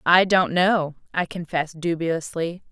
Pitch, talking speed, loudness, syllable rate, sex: 170 Hz, 130 wpm, -22 LUFS, 4.3 syllables/s, female